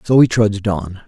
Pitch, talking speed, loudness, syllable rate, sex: 105 Hz, 225 wpm, -16 LUFS, 5.3 syllables/s, male